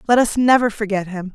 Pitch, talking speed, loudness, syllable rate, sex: 215 Hz, 220 wpm, -17 LUFS, 5.9 syllables/s, female